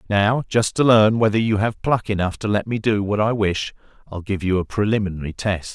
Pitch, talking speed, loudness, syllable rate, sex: 105 Hz, 230 wpm, -20 LUFS, 5.3 syllables/s, male